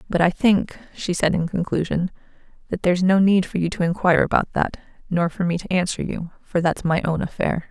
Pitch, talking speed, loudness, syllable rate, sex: 180 Hz, 220 wpm, -21 LUFS, 5.7 syllables/s, female